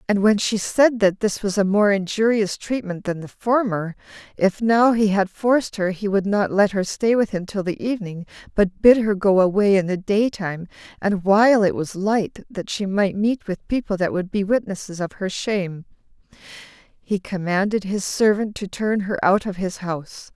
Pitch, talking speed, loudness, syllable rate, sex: 200 Hz, 200 wpm, -20 LUFS, 4.8 syllables/s, female